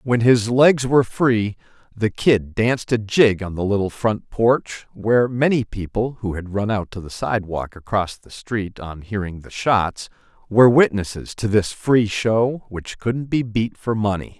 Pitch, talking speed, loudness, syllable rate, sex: 110 Hz, 185 wpm, -20 LUFS, 4.3 syllables/s, male